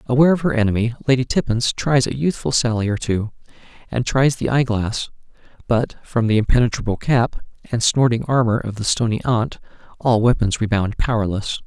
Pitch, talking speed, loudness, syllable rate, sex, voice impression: 120 Hz, 170 wpm, -19 LUFS, 5.4 syllables/s, male, very masculine, adult-like, slightly thick, slightly tensed, slightly weak, slightly dark, slightly hard, slightly muffled, fluent, slightly raspy, cool, intellectual, refreshing, slightly sincere, calm, slightly friendly, reassuring, slightly unique, elegant, slightly wild, slightly sweet, lively, strict, slightly modest